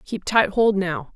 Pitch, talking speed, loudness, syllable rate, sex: 195 Hz, 210 wpm, -20 LUFS, 4.0 syllables/s, female